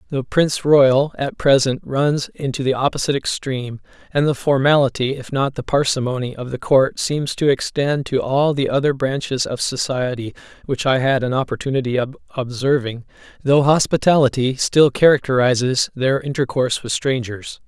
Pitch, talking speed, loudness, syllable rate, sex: 135 Hz, 155 wpm, -18 LUFS, 5.1 syllables/s, male